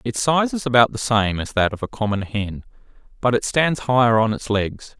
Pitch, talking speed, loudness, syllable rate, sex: 120 Hz, 230 wpm, -20 LUFS, 5.1 syllables/s, male